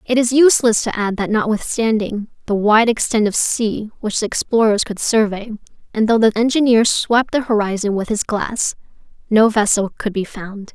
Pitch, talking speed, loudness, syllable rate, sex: 220 Hz, 180 wpm, -17 LUFS, 5.0 syllables/s, female